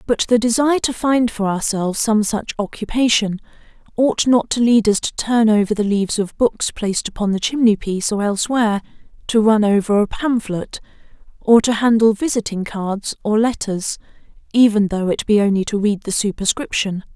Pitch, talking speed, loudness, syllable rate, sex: 215 Hz, 175 wpm, -17 LUFS, 5.3 syllables/s, female